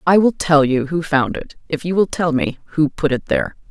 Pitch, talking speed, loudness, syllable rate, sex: 160 Hz, 260 wpm, -18 LUFS, 5.3 syllables/s, female